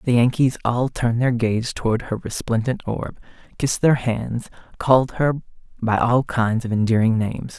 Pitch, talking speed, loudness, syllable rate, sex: 120 Hz, 165 wpm, -21 LUFS, 5.0 syllables/s, male